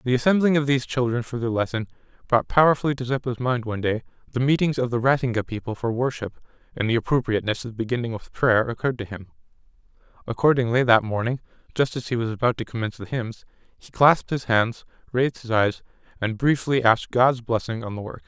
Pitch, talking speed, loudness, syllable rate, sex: 120 Hz, 195 wpm, -23 LUFS, 6.5 syllables/s, male